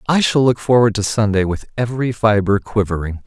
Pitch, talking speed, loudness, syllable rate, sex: 110 Hz, 185 wpm, -17 LUFS, 5.7 syllables/s, male